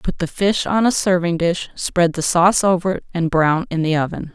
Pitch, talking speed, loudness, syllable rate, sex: 175 Hz, 235 wpm, -18 LUFS, 5.2 syllables/s, female